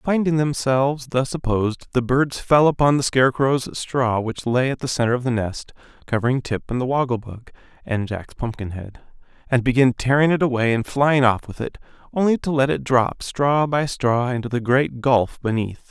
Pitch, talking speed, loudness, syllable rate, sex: 130 Hz, 195 wpm, -20 LUFS, 5.0 syllables/s, male